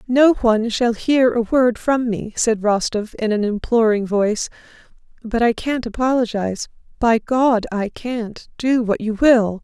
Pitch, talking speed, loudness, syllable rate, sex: 230 Hz, 160 wpm, -18 LUFS, 4.3 syllables/s, female